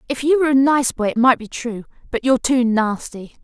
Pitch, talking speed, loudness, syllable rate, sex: 250 Hz, 225 wpm, -18 LUFS, 5.8 syllables/s, female